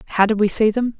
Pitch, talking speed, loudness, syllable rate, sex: 215 Hz, 300 wpm, -18 LUFS, 7.9 syllables/s, female